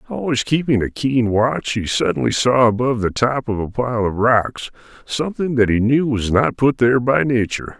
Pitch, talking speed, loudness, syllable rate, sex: 120 Hz, 200 wpm, -18 LUFS, 5.1 syllables/s, male